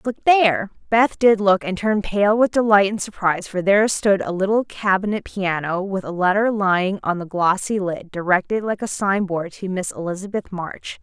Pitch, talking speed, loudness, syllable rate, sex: 195 Hz, 195 wpm, -20 LUFS, 5.1 syllables/s, female